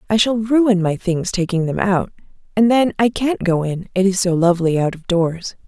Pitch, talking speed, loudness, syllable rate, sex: 190 Hz, 220 wpm, -17 LUFS, 4.9 syllables/s, female